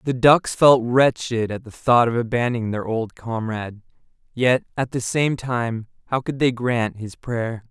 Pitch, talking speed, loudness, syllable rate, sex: 120 Hz, 180 wpm, -21 LUFS, 4.4 syllables/s, male